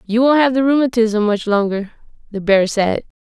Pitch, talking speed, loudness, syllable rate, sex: 225 Hz, 185 wpm, -16 LUFS, 5.1 syllables/s, female